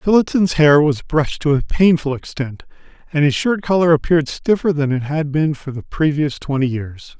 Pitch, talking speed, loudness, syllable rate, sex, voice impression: 150 Hz, 190 wpm, -17 LUFS, 5.1 syllables/s, male, masculine, middle-aged, slightly relaxed, powerful, slightly soft, muffled, slightly raspy, intellectual, slightly calm, mature, wild, slightly lively, slightly modest